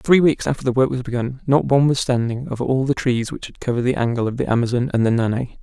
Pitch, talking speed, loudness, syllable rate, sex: 125 Hz, 280 wpm, -20 LUFS, 6.7 syllables/s, male